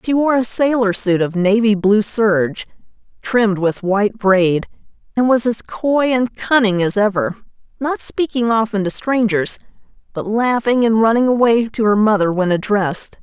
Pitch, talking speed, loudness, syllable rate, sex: 215 Hz, 165 wpm, -16 LUFS, 4.7 syllables/s, female